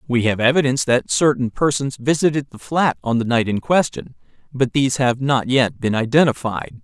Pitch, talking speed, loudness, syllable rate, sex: 130 Hz, 185 wpm, -18 LUFS, 5.3 syllables/s, male